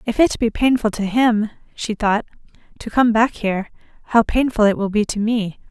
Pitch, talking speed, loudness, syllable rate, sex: 220 Hz, 200 wpm, -19 LUFS, 5.1 syllables/s, female